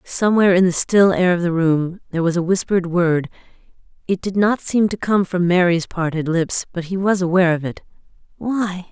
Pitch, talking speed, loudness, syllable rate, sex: 180 Hz, 200 wpm, -18 LUFS, 5.5 syllables/s, female